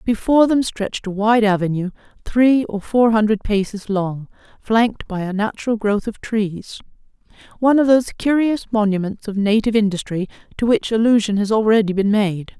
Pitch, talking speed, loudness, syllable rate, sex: 215 Hz, 155 wpm, -18 LUFS, 5.4 syllables/s, female